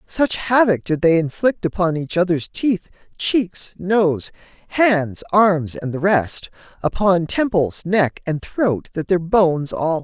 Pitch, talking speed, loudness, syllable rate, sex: 180 Hz, 155 wpm, -19 LUFS, 3.8 syllables/s, female